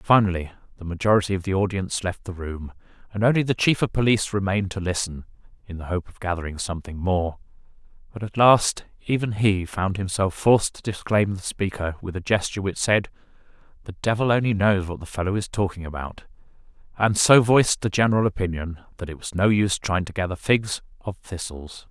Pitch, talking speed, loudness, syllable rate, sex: 95 Hz, 190 wpm, -23 LUFS, 5.4 syllables/s, male